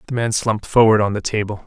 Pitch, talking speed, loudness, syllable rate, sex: 110 Hz, 255 wpm, -17 LUFS, 6.8 syllables/s, male